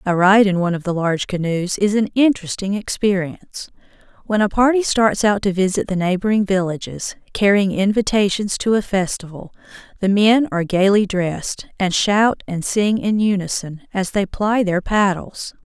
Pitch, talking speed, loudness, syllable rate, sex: 195 Hz, 165 wpm, -18 LUFS, 5.1 syllables/s, female